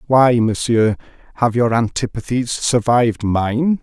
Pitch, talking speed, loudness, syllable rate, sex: 120 Hz, 110 wpm, -17 LUFS, 4.1 syllables/s, male